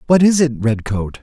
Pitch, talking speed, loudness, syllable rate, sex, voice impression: 135 Hz, 195 wpm, -16 LUFS, 4.8 syllables/s, male, masculine, adult-like, cool, sincere, slightly friendly